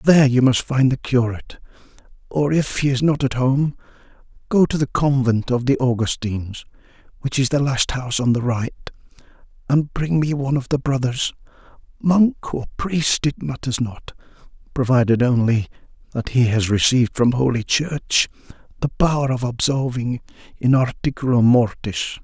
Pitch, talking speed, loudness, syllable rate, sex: 130 Hz, 155 wpm, -19 LUFS, 4.9 syllables/s, male